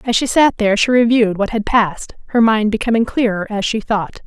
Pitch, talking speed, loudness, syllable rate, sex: 220 Hz, 225 wpm, -15 LUFS, 5.9 syllables/s, female